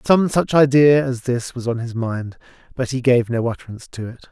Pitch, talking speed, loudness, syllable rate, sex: 125 Hz, 220 wpm, -18 LUFS, 5.2 syllables/s, male